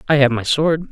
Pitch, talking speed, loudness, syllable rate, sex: 140 Hz, 260 wpm, -16 LUFS, 5.8 syllables/s, male